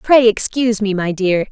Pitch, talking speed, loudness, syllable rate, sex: 210 Hz, 200 wpm, -16 LUFS, 5.0 syllables/s, female